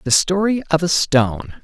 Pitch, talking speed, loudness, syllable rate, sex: 165 Hz, 185 wpm, -17 LUFS, 4.6 syllables/s, male